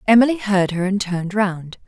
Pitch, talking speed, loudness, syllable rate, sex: 200 Hz, 190 wpm, -19 LUFS, 5.3 syllables/s, female